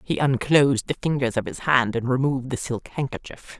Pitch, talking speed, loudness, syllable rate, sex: 130 Hz, 200 wpm, -23 LUFS, 5.6 syllables/s, female